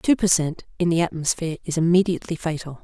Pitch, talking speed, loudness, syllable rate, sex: 170 Hz, 190 wpm, -22 LUFS, 6.5 syllables/s, female